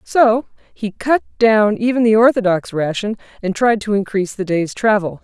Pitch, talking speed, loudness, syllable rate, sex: 210 Hz, 170 wpm, -16 LUFS, 4.9 syllables/s, female